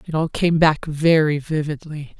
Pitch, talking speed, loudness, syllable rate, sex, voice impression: 155 Hz, 165 wpm, -19 LUFS, 4.4 syllables/s, female, feminine, adult-like, slightly thick, powerful, slightly hard, slightly muffled, raspy, friendly, reassuring, lively, kind, slightly modest